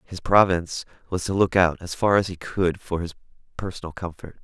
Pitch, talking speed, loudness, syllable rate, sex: 90 Hz, 205 wpm, -23 LUFS, 5.5 syllables/s, male